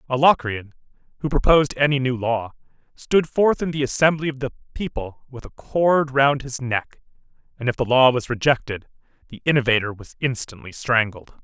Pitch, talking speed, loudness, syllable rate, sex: 130 Hz, 170 wpm, -21 LUFS, 5.2 syllables/s, male